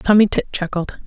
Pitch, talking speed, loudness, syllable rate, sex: 190 Hz, 170 wpm, -18 LUFS, 5.3 syllables/s, female